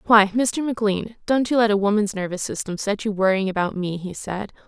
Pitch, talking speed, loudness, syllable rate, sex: 205 Hz, 220 wpm, -22 LUFS, 5.6 syllables/s, female